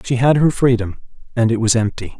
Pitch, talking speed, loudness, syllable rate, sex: 120 Hz, 220 wpm, -16 LUFS, 5.8 syllables/s, male